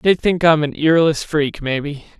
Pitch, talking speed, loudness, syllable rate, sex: 155 Hz, 190 wpm, -17 LUFS, 4.4 syllables/s, male